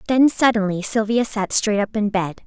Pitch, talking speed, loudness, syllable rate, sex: 215 Hz, 195 wpm, -19 LUFS, 4.9 syllables/s, female